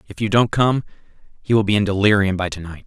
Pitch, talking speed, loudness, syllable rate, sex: 100 Hz, 250 wpm, -18 LUFS, 6.5 syllables/s, male